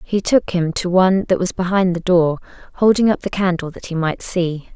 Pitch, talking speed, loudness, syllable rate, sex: 180 Hz, 225 wpm, -18 LUFS, 5.2 syllables/s, female